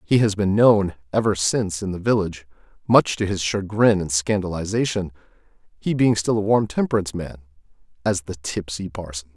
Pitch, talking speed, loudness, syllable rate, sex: 95 Hz, 165 wpm, -21 LUFS, 5.5 syllables/s, male